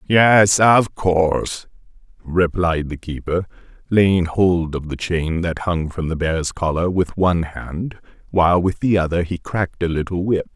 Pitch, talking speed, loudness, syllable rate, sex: 90 Hz, 165 wpm, -19 LUFS, 4.2 syllables/s, male